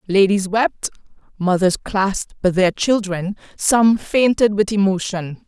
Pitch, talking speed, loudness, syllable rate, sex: 200 Hz, 110 wpm, -18 LUFS, 3.8 syllables/s, female